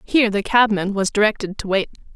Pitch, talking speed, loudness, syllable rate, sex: 205 Hz, 195 wpm, -19 LUFS, 6.0 syllables/s, female